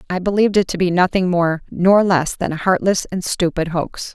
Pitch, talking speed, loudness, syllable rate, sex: 180 Hz, 215 wpm, -17 LUFS, 5.1 syllables/s, female